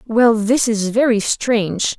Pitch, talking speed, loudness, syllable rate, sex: 225 Hz, 150 wpm, -16 LUFS, 3.8 syllables/s, female